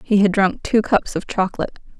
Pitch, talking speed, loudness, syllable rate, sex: 200 Hz, 210 wpm, -19 LUFS, 5.8 syllables/s, female